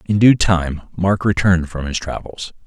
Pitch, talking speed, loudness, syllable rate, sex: 90 Hz, 180 wpm, -17 LUFS, 4.6 syllables/s, male